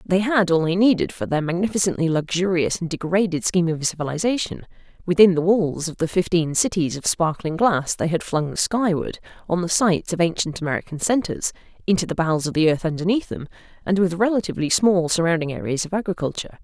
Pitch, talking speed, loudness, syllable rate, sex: 175 Hz, 185 wpm, -21 LUFS, 6.0 syllables/s, female